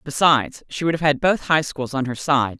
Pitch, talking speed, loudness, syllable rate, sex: 140 Hz, 255 wpm, -20 LUFS, 5.3 syllables/s, female